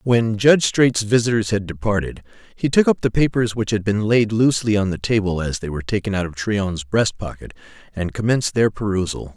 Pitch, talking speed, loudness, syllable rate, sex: 110 Hz, 205 wpm, -19 LUFS, 5.6 syllables/s, male